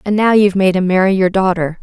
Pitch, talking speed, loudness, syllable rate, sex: 190 Hz, 265 wpm, -13 LUFS, 6.4 syllables/s, female